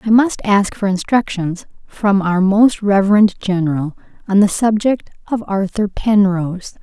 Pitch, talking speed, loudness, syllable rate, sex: 200 Hz, 140 wpm, -16 LUFS, 4.4 syllables/s, female